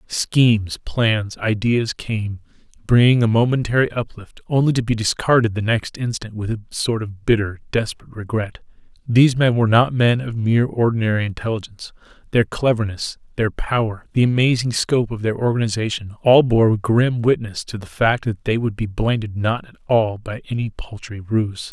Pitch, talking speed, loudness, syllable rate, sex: 115 Hz, 165 wpm, -19 LUFS, 5.1 syllables/s, male